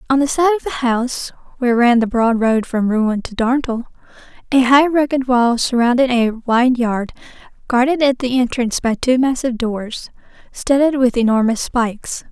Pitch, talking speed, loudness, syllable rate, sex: 245 Hz, 170 wpm, -16 LUFS, 5.1 syllables/s, female